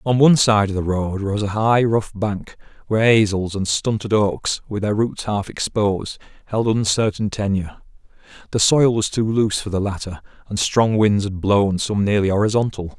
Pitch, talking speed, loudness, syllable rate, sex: 105 Hz, 185 wpm, -19 LUFS, 5.0 syllables/s, male